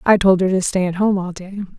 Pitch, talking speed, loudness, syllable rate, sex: 190 Hz, 305 wpm, -17 LUFS, 6.3 syllables/s, female